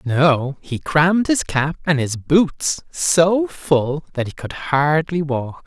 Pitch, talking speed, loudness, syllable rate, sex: 155 Hz, 160 wpm, -19 LUFS, 3.2 syllables/s, male